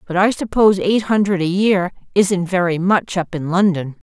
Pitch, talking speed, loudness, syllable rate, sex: 185 Hz, 190 wpm, -17 LUFS, 4.9 syllables/s, female